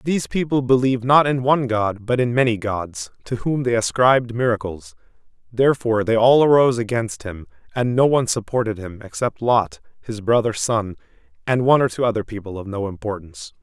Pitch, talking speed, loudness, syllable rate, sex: 120 Hz, 180 wpm, -19 LUFS, 5.8 syllables/s, male